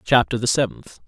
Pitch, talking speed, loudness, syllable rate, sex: 115 Hz, 170 wpm, -20 LUFS, 5.4 syllables/s, male